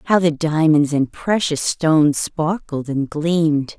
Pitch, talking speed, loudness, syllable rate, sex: 155 Hz, 145 wpm, -18 LUFS, 3.9 syllables/s, female